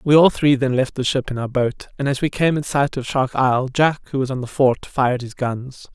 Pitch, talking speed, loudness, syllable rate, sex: 135 Hz, 280 wpm, -19 LUFS, 5.3 syllables/s, male